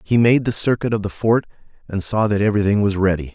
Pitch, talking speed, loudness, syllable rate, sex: 105 Hz, 235 wpm, -18 LUFS, 6.4 syllables/s, male